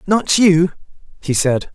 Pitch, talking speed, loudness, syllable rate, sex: 170 Hz, 140 wpm, -15 LUFS, 3.6 syllables/s, male